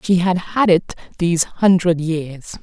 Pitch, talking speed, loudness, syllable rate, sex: 175 Hz, 160 wpm, -17 LUFS, 4.0 syllables/s, female